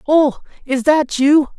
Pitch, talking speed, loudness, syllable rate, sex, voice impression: 285 Hz, 150 wpm, -15 LUFS, 3.6 syllables/s, male, very masculine, very middle-aged, thick, very tensed, powerful, bright, slightly soft, clear, fluent, cool, intellectual, very refreshing, sincere, slightly calm, friendly, reassuring, slightly unique, slightly elegant, slightly wild, slightly sweet, lively, kind, slightly intense